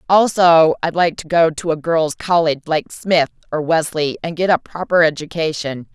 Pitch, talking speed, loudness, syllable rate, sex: 160 Hz, 180 wpm, -17 LUFS, 5.1 syllables/s, female